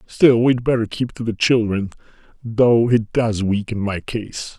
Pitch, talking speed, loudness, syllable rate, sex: 115 Hz, 170 wpm, -19 LUFS, 4.1 syllables/s, male